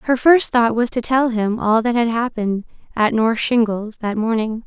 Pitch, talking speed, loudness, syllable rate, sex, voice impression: 230 Hz, 205 wpm, -18 LUFS, 4.6 syllables/s, female, very feminine, very young, very thin, slightly relaxed, slightly weak, slightly dark, hard, clear, fluent, slightly raspy, very cute, slightly intellectual, sincere, friendly, reassuring, very unique, elegant, sweet, modest